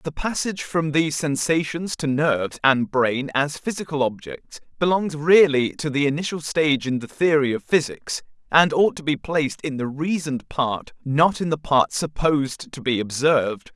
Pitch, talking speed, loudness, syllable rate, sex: 150 Hz, 175 wpm, -22 LUFS, 4.8 syllables/s, male